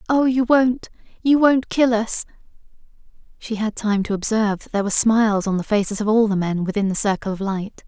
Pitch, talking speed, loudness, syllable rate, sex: 220 Hz, 205 wpm, -19 LUFS, 5.8 syllables/s, female